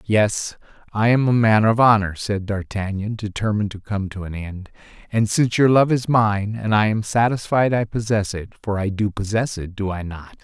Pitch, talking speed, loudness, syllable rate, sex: 105 Hz, 200 wpm, -20 LUFS, 5.0 syllables/s, male